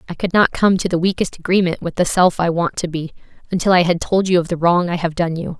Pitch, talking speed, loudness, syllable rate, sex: 175 Hz, 290 wpm, -17 LUFS, 6.2 syllables/s, female